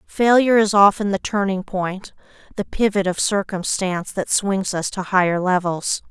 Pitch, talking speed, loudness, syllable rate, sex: 195 Hz, 155 wpm, -19 LUFS, 4.7 syllables/s, female